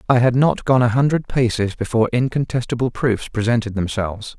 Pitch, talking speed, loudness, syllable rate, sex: 120 Hz, 165 wpm, -19 LUFS, 5.7 syllables/s, male